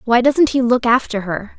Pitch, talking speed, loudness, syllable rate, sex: 240 Hz, 225 wpm, -16 LUFS, 4.8 syllables/s, female